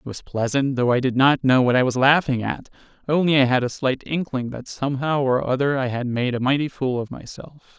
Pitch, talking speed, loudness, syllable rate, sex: 130 Hz, 240 wpm, -21 LUFS, 5.5 syllables/s, male